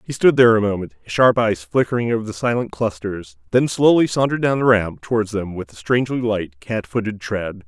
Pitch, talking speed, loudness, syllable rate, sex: 110 Hz, 210 wpm, -19 LUFS, 5.6 syllables/s, male